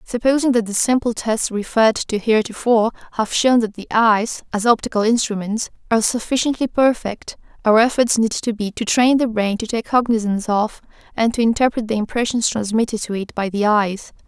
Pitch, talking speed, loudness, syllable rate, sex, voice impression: 225 Hz, 180 wpm, -18 LUFS, 5.5 syllables/s, female, very feminine, young, very thin, very tensed, powerful, very bright, hard, very clear, fluent, slightly raspy, cute, intellectual, very refreshing, very sincere, slightly calm, friendly, reassuring, unique, slightly elegant, wild, sweet, lively, slightly strict, intense